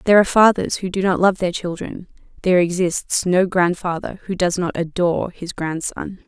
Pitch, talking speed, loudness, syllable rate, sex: 180 Hz, 180 wpm, -19 LUFS, 5.2 syllables/s, female